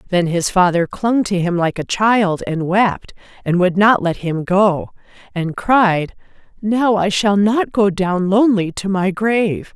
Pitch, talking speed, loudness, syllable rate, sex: 195 Hz, 180 wpm, -16 LUFS, 4.0 syllables/s, female